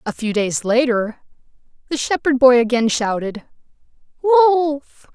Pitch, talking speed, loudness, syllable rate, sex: 260 Hz, 115 wpm, -17 LUFS, 3.9 syllables/s, female